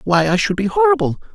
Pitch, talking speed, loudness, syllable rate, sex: 170 Hz, 225 wpm, -16 LUFS, 6.3 syllables/s, male